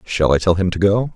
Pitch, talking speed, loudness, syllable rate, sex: 95 Hz, 310 wpm, -17 LUFS, 5.8 syllables/s, male